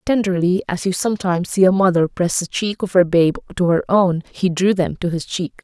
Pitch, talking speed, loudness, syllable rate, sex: 185 Hz, 235 wpm, -18 LUFS, 5.4 syllables/s, female